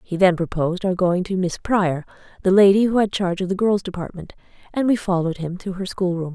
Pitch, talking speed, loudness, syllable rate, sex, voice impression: 185 Hz, 235 wpm, -20 LUFS, 6.1 syllables/s, female, feminine, slightly adult-like, calm, elegant